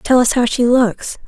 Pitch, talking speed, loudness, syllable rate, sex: 245 Hz, 235 wpm, -14 LUFS, 4.3 syllables/s, female